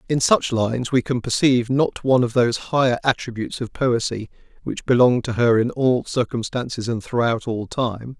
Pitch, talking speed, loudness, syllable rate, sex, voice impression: 120 Hz, 185 wpm, -20 LUFS, 5.3 syllables/s, male, masculine, adult-like, tensed, bright, clear, fluent, intellectual, friendly, lively, light